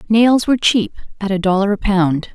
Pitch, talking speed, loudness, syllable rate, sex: 205 Hz, 205 wpm, -15 LUFS, 5.4 syllables/s, female